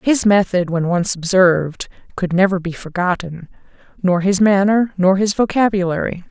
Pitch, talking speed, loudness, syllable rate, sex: 185 Hz, 145 wpm, -16 LUFS, 4.9 syllables/s, female